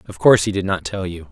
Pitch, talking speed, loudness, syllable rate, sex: 95 Hz, 320 wpm, -18 LUFS, 6.7 syllables/s, male